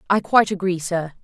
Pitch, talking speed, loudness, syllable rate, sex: 185 Hz, 195 wpm, -19 LUFS, 6.0 syllables/s, female